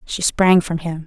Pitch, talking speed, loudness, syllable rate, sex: 170 Hz, 225 wpm, -17 LUFS, 4.1 syllables/s, female